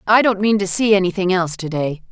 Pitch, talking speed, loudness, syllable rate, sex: 190 Hz, 255 wpm, -17 LUFS, 6.3 syllables/s, female